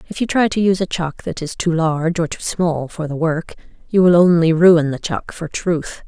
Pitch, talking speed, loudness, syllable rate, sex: 170 Hz, 245 wpm, -17 LUFS, 5.0 syllables/s, female